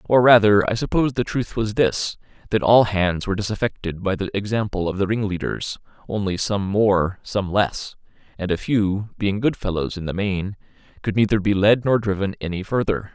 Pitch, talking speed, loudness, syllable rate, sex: 100 Hz, 185 wpm, -21 LUFS, 5.1 syllables/s, male